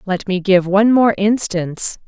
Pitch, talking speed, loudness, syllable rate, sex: 195 Hz, 175 wpm, -15 LUFS, 4.7 syllables/s, female